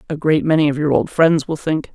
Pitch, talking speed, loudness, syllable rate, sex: 150 Hz, 280 wpm, -17 LUFS, 5.8 syllables/s, female